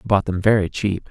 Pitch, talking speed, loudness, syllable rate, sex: 100 Hz, 270 wpm, -19 LUFS, 5.9 syllables/s, male